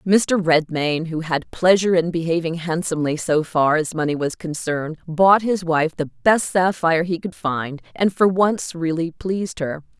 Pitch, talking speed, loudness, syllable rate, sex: 170 Hz, 175 wpm, -20 LUFS, 4.6 syllables/s, female